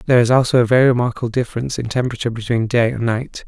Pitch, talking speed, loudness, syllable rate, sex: 120 Hz, 225 wpm, -17 LUFS, 8.2 syllables/s, male